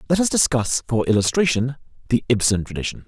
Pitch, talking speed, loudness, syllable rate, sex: 125 Hz, 155 wpm, -20 LUFS, 6.1 syllables/s, male